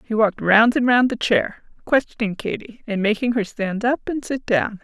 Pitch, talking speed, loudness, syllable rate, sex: 225 Hz, 210 wpm, -20 LUFS, 4.8 syllables/s, female